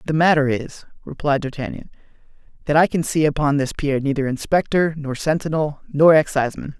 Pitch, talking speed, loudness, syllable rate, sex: 145 Hz, 160 wpm, -19 LUFS, 5.7 syllables/s, male